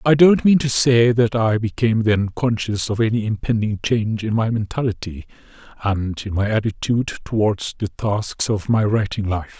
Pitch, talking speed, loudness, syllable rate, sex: 110 Hz, 175 wpm, -19 LUFS, 4.9 syllables/s, male